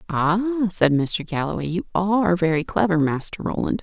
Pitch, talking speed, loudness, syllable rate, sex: 180 Hz, 155 wpm, -21 LUFS, 4.8 syllables/s, female